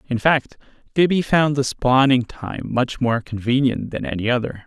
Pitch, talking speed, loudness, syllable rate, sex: 125 Hz, 165 wpm, -20 LUFS, 4.7 syllables/s, male